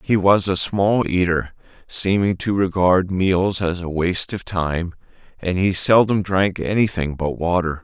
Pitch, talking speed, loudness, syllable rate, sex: 90 Hz, 160 wpm, -19 LUFS, 4.2 syllables/s, male